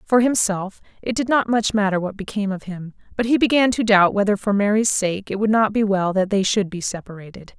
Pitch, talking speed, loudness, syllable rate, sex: 205 Hz, 235 wpm, -19 LUFS, 5.7 syllables/s, female